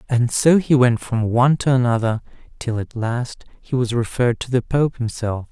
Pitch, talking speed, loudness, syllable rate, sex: 120 Hz, 195 wpm, -19 LUFS, 5.0 syllables/s, male